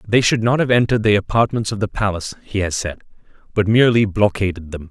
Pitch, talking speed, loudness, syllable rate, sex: 105 Hz, 210 wpm, -18 LUFS, 6.6 syllables/s, male